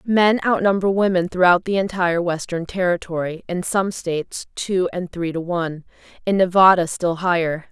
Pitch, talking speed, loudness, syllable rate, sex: 180 Hz, 155 wpm, -20 LUFS, 5.0 syllables/s, female